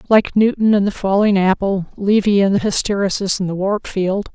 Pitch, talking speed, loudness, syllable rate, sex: 200 Hz, 195 wpm, -17 LUFS, 5.2 syllables/s, female